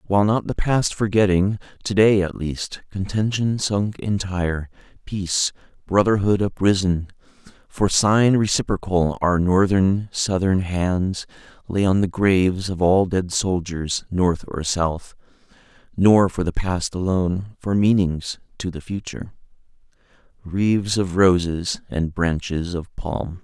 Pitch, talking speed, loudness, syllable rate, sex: 95 Hz, 125 wpm, -21 LUFS, 3.7 syllables/s, male